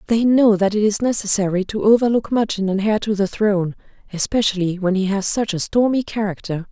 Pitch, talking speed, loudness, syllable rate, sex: 205 Hz, 205 wpm, -18 LUFS, 5.7 syllables/s, female